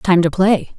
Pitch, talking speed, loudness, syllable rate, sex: 185 Hz, 230 wpm, -15 LUFS, 4.1 syllables/s, female